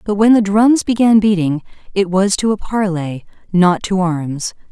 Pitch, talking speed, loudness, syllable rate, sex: 195 Hz, 180 wpm, -15 LUFS, 4.4 syllables/s, female